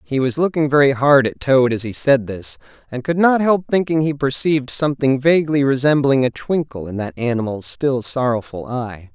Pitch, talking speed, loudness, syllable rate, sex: 135 Hz, 190 wpm, -18 LUFS, 5.2 syllables/s, male